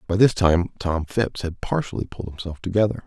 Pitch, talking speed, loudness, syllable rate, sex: 95 Hz, 195 wpm, -23 LUFS, 5.7 syllables/s, male